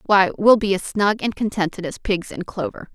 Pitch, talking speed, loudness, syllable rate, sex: 195 Hz, 225 wpm, -20 LUFS, 5.1 syllables/s, female